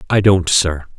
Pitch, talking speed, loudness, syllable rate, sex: 85 Hz, 180 wpm, -14 LUFS, 4.1 syllables/s, male